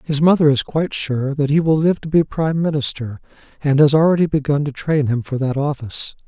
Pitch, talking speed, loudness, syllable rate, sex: 145 Hz, 220 wpm, -18 LUFS, 5.8 syllables/s, male